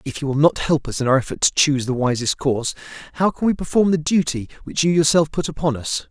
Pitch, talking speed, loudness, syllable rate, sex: 150 Hz, 255 wpm, -19 LUFS, 6.3 syllables/s, male